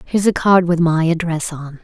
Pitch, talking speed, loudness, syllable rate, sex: 170 Hz, 230 wpm, -16 LUFS, 5.2 syllables/s, female